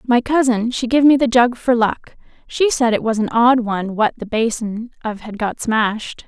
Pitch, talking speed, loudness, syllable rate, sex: 235 Hz, 220 wpm, -17 LUFS, 4.8 syllables/s, female